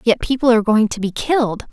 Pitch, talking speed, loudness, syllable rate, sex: 230 Hz, 245 wpm, -17 LUFS, 6.4 syllables/s, female